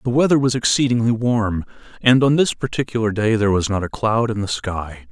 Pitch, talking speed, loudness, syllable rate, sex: 115 Hz, 210 wpm, -19 LUFS, 5.6 syllables/s, male